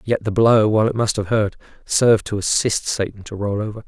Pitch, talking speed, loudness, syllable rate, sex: 105 Hz, 230 wpm, -19 LUFS, 5.7 syllables/s, male